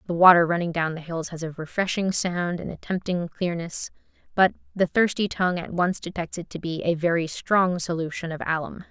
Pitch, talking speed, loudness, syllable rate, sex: 175 Hz, 200 wpm, -24 LUFS, 5.4 syllables/s, female